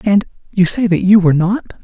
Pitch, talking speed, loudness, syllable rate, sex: 195 Hz, 195 wpm, -13 LUFS, 5.5 syllables/s, female